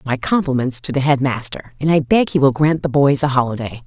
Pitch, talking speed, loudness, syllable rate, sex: 140 Hz, 250 wpm, -17 LUFS, 5.7 syllables/s, female